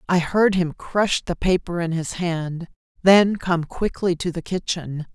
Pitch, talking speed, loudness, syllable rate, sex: 175 Hz, 175 wpm, -21 LUFS, 4.0 syllables/s, female